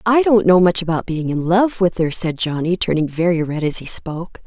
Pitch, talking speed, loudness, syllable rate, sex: 175 Hz, 240 wpm, -17 LUFS, 5.3 syllables/s, female